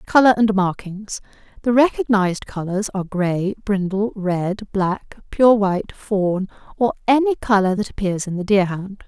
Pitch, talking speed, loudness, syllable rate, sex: 200 Hz, 140 wpm, -19 LUFS, 4.5 syllables/s, female